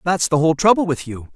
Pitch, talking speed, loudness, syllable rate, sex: 155 Hz, 265 wpm, -17 LUFS, 6.6 syllables/s, male